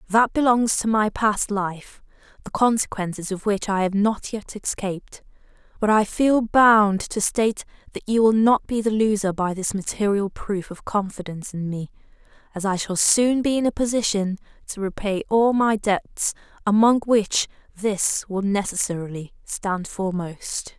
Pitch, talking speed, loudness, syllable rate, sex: 205 Hz, 160 wpm, -22 LUFS, 4.5 syllables/s, female